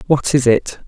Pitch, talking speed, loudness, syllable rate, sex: 135 Hz, 205 wpm, -15 LUFS, 4.3 syllables/s, female